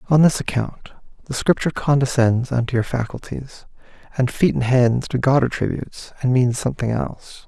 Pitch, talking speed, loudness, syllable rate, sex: 130 Hz, 160 wpm, -20 LUFS, 5.5 syllables/s, male